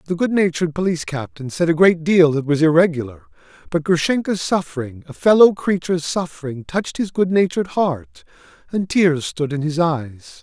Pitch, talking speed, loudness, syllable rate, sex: 165 Hz, 160 wpm, -18 LUFS, 5.4 syllables/s, male